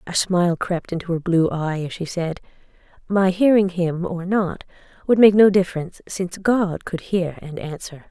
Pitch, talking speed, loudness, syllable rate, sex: 180 Hz, 185 wpm, -20 LUFS, 4.9 syllables/s, female